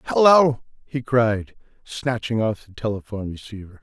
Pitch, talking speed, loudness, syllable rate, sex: 115 Hz, 125 wpm, -21 LUFS, 4.9 syllables/s, male